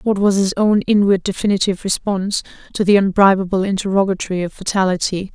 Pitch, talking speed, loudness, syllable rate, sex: 195 Hz, 145 wpm, -17 LUFS, 6.4 syllables/s, female